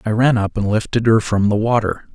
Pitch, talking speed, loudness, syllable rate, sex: 110 Hz, 250 wpm, -17 LUFS, 5.5 syllables/s, male